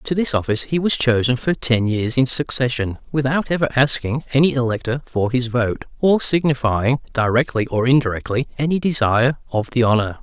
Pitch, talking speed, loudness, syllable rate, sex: 130 Hz, 170 wpm, -19 LUFS, 5.5 syllables/s, male